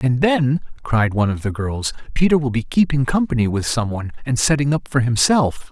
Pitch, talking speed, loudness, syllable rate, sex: 130 Hz, 210 wpm, -19 LUFS, 5.6 syllables/s, male